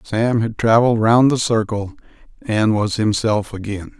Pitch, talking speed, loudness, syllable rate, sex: 110 Hz, 150 wpm, -17 LUFS, 4.4 syllables/s, male